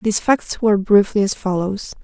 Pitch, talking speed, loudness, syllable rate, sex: 205 Hz, 175 wpm, -17 LUFS, 5.2 syllables/s, female